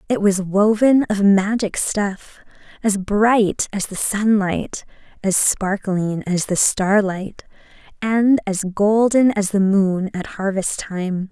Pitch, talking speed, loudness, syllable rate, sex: 200 Hz, 135 wpm, -18 LUFS, 3.4 syllables/s, female